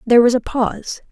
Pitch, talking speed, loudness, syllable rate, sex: 235 Hz, 215 wpm, -16 LUFS, 7.1 syllables/s, female